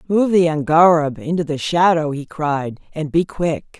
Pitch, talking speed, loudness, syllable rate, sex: 160 Hz, 175 wpm, -17 LUFS, 4.3 syllables/s, female